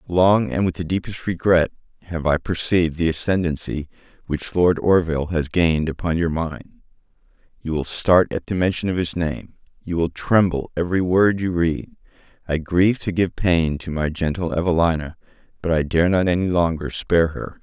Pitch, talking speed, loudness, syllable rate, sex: 85 Hz, 165 wpm, -21 LUFS, 5.1 syllables/s, male